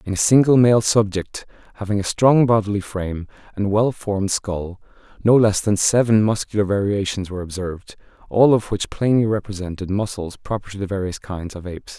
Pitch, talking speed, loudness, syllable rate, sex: 100 Hz, 170 wpm, -19 LUFS, 5.3 syllables/s, male